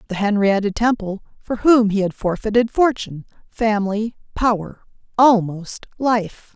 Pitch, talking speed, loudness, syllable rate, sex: 215 Hz, 120 wpm, -19 LUFS, 4.5 syllables/s, female